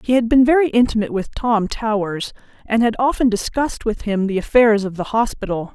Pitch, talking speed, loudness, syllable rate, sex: 225 Hz, 200 wpm, -18 LUFS, 5.8 syllables/s, female